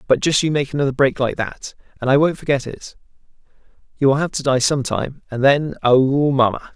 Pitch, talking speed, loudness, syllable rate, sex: 135 Hz, 195 wpm, -18 LUFS, 5.8 syllables/s, male